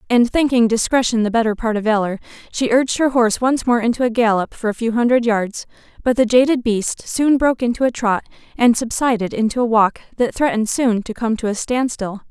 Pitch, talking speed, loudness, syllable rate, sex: 235 Hz, 215 wpm, -17 LUFS, 5.8 syllables/s, female